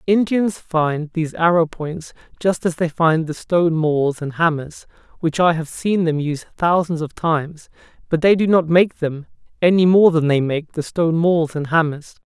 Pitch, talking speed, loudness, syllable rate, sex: 165 Hz, 190 wpm, -18 LUFS, 4.7 syllables/s, male